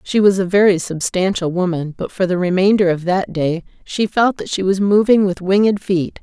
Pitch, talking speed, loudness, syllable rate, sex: 190 Hz, 210 wpm, -16 LUFS, 5.1 syllables/s, female